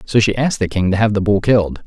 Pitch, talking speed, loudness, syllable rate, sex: 100 Hz, 320 wpm, -16 LUFS, 6.8 syllables/s, male